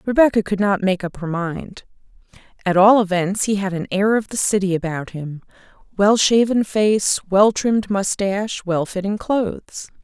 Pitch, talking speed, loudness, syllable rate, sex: 200 Hz, 160 wpm, -18 LUFS, 4.7 syllables/s, female